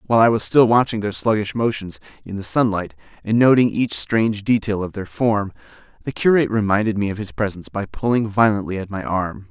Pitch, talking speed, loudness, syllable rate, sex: 105 Hz, 200 wpm, -19 LUFS, 5.8 syllables/s, male